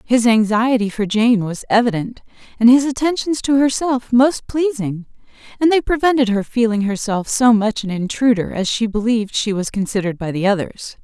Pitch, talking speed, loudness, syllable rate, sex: 230 Hz, 175 wpm, -17 LUFS, 5.2 syllables/s, female